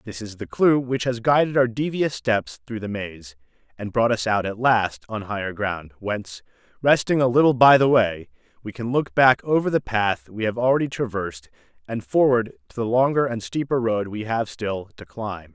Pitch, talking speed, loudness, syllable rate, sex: 115 Hz, 205 wpm, -22 LUFS, 5.0 syllables/s, male